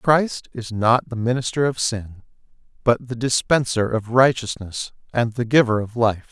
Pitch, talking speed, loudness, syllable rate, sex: 120 Hz, 160 wpm, -21 LUFS, 4.4 syllables/s, male